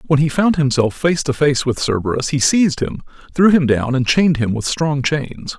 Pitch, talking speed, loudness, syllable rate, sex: 140 Hz, 225 wpm, -16 LUFS, 5.5 syllables/s, male